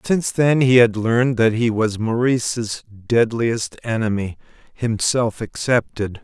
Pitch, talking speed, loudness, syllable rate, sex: 115 Hz, 115 wpm, -19 LUFS, 3.9 syllables/s, male